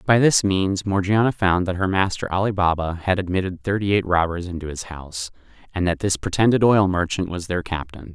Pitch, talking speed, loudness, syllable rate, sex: 95 Hz, 200 wpm, -21 LUFS, 5.6 syllables/s, male